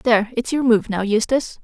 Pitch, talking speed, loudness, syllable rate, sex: 230 Hz, 220 wpm, -19 LUFS, 5.8 syllables/s, female